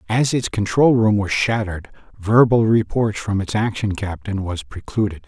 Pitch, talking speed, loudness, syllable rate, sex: 105 Hz, 160 wpm, -19 LUFS, 4.7 syllables/s, male